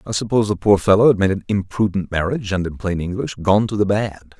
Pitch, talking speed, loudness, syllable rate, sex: 100 Hz, 245 wpm, -18 LUFS, 6.2 syllables/s, male